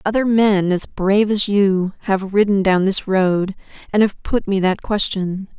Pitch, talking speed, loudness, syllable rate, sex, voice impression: 200 Hz, 185 wpm, -17 LUFS, 4.2 syllables/s, female, feminine, adult-like, bright, clear, fluent, slightly intellectual, friendly, elegant, slightly lively, slightly sharp